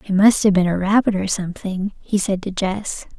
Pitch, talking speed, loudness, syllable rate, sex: 195 Hz, 225 wpm, -19 LUFS, 5.2 syllables/s, female